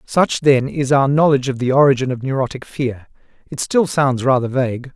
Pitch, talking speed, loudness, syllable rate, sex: 135 Hz, 195 wpm, -17 LUFS, 5.4 syllables/s, male